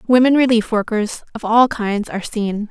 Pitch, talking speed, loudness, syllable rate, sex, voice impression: 225 Hz, 180 wpm, -17 LUFS, 4.9 syllables/s, female, feminine, slightly young, tensed, clear, fluent, slightly cute, slightly sincere, friendly